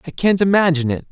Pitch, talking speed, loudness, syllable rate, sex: 170 Hz, 215 wpm, -16 LUFS, 7.5 syllables/s, male